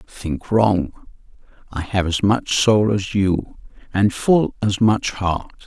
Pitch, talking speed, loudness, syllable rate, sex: 100 Hz, 140 wpm, -19 LUFS, 3.7 syllables/s, male